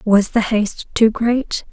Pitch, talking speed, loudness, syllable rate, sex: 220 Hz, 175 wpm, -17 LUFS, 3.9 syllables/s, female